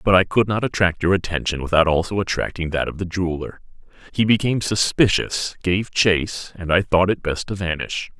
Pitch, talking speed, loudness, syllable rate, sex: 90 Hz, 190 wpm, -20 LUFS, 5.6 syllables/s, male